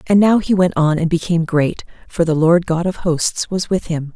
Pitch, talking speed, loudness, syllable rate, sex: 170 Hz, 245 wpm, -16 LUFS, 5.0 syllables/s, female